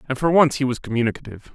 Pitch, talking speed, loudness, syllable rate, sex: 130 Hz, 235 wpm, -20 LUFS, 8.0 syllables/s, male